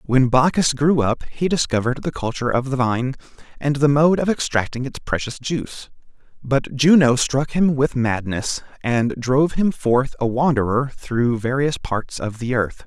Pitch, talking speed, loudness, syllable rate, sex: 130 Hz, 175 wpm, -20 LUFS, 4.6 syllables/s, male